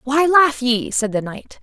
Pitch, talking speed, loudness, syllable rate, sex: 255 Hz, 220 wpm, -17 LUFS, 4.2 syllables/s, female